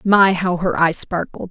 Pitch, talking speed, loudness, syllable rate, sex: 180 Hz, 200 wpm, -17 LUFS, 4.1 syllables/s, female